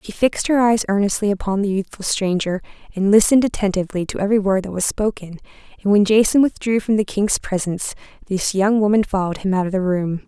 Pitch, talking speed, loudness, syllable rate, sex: 200 Hz, 205 wpm, -19 LUFS, 6.3 syllables/s, female